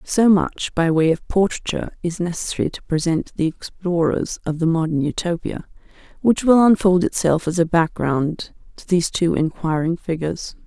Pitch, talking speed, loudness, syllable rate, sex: 170 Hz, 160 wpm, -20 LUFS, 5.0 syllables/s, female